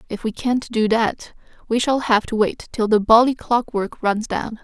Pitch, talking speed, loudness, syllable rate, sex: 225 Hz, 205 wpm, -19 LUFS, 4.5 syllables/s, female